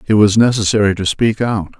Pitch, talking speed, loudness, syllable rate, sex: 105 Hz, 200 wpm, -14 LUFS, 5.6 syllables/s, male